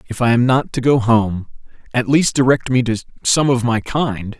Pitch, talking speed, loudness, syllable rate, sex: 120 Hz, 220 wpm, -16 LUFS, 4.6 syllables/s, male